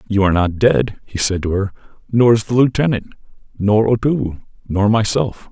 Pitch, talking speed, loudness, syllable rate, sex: 110 Hz, 175 wpm, -17 LUFS, 5.4 syllables/s, male